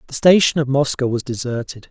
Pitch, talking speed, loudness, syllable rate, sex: 135 Hz, 190 wpm, -18 LUFS, 5.8 syllables/s, male